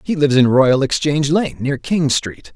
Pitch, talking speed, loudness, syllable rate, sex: 140 Hz, 210 wpm, -16 LUFS, 5.0 syllables/s, male